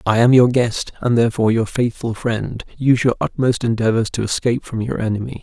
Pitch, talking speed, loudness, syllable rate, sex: 115 Hz, 200 wpm, -18 LUFS, 5.9 syllables/s, male